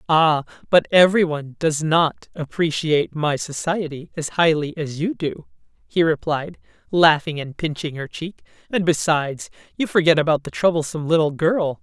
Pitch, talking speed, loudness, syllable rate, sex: 160 Hz, 145 wpm, -20 LUFS, 4.9 syllables/s, female